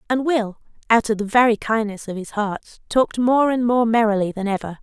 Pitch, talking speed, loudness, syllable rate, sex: 225 Hz, 210 wpm, -20 LUFS, 5.6 syllables/s, female